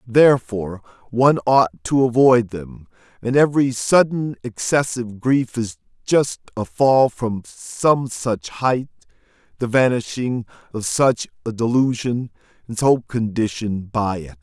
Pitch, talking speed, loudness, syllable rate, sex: 120 Hz, 125 wpm, -19 LUFS, 4.2 syllables/s, male